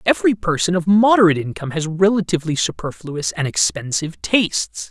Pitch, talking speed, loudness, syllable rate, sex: 170 Hz, 135 wpm, -18 LUFS, 6.1 syllables/s, male